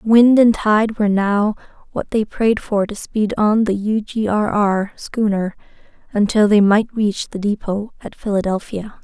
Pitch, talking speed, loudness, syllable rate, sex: 210 Hz, 175 wpm, -17 LUFS, 4.2 syllables/s, female